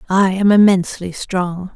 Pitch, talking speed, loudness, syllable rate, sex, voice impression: 185 Hz, 135 wpm, -15 LUFS, 4.6 syllables/s, female, very feminine, slightly young, thin, tensed, slightly powerful, slightly dark, slightly soft, very clear, fluent, raspy, cool, intellectual, slightly refreshing, sincere, calm, slightly friendly, reassuring, slightly unique, elegant, wild, slightly sweet, lively, strict, slightly intense, sharp, light